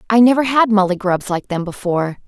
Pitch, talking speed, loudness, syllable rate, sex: 205 Hz, 185 wpm, -16 LUFS, 5.9 syllables/s, female